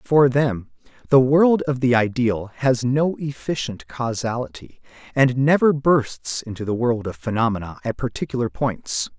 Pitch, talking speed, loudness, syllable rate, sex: 125 Hz, 145 wpm, -21 LUFS, 4.4 syllables/s, male